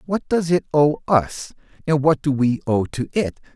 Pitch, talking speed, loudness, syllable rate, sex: 145 Hz, 205 wpm, -20 LUFS, 4.3 syllables/s, male